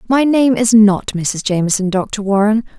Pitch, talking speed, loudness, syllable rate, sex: 215 Hz, 170 wpm, -14 LUFS, 4.4 syllables/s, female